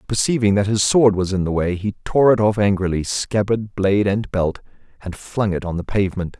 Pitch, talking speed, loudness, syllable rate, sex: 100 Hz, 215 wpm, -19 LUFS, 5.4 syllables/s, male